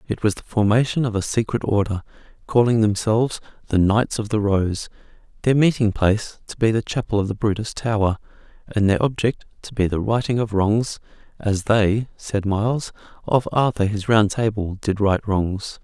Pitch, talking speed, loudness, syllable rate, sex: 105 Hz, 180 wpm, -21 LUFS, 5.0 syllables/s, male